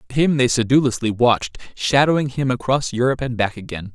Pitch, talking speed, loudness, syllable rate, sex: 125 Hz, 165 wpm, -19 LUFS, 5.9 syllables/s, male